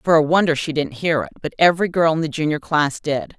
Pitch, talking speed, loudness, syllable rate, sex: 155 Hz, 265 wpm, -19 LUFS, 6.1 syllables/s, female